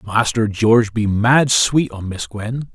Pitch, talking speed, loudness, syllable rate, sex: 110 Hz, 175 wpm, -17 LUFS, 3.8 syllables/s, male